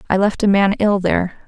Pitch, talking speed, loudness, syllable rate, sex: 195 Hz, 245 wpm, -16 LUFS, 6.3 syllables/s, female